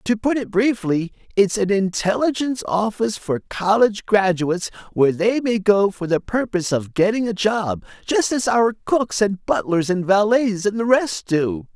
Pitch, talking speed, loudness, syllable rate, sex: 205 Hz, 175 wpm, -20 LUFS, 4.7 syllables/s, male